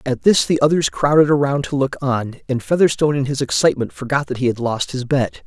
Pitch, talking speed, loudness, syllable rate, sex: 140 Hz, 230 wpm, -18 LUFS, 5.9 syllables/s, male